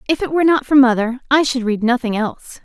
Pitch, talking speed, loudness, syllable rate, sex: 255 Hz, 250 wpm, -16 LUFS, 6.4 syllables/s, female